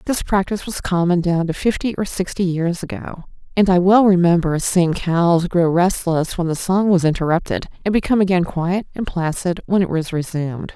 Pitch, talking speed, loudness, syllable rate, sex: 180 Hz, 190 wpm, -18 LUFS, 5.2 syllables/s, female